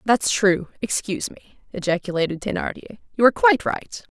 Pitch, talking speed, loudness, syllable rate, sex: 205 Hz, 145 wpm, -21 LUFS, 5.9 syllables/s, female